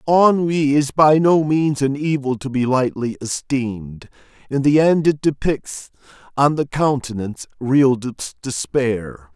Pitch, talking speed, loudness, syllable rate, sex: 140 Hz, 135 wpm, -18 LUFS, 3.8 syllables/s, male